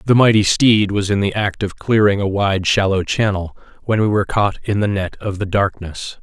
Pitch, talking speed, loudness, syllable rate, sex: 100 Hz, 220 wpm, -17 LUFS, 5.1 syllables/s, male